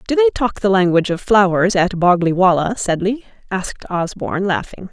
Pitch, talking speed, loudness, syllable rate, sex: 195 Hz, 170 wpm, -17 LUFS, 5.5 syllables/s, female